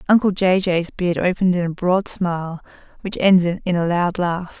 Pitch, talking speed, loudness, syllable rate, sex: 180 Hz, 195 wpm, -19 LUFS, 5.1 syllables/s, female